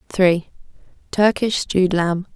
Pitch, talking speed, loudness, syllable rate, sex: 185 Hz, 75 wpm, -19 LUFS, 4.0 syllables/s, female